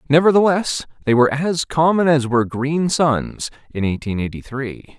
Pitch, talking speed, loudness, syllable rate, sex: 140 Hz, 155 wpm, -18 LUFS, 4.8 syllables/s, male